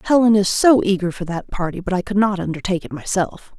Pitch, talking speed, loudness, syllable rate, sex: 190 Hz, 235 wpm, -19 LUFS, 6.1 syllables/s, female